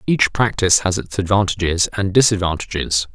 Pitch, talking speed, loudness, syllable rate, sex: 95 Hz, 135 wpm, -17 LUFS, 5.4 syllables/s, male